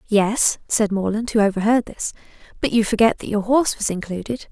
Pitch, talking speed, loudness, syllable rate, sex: 215 Hz, 185 wpm, -20 LUFS, 5.5 syllables/s, female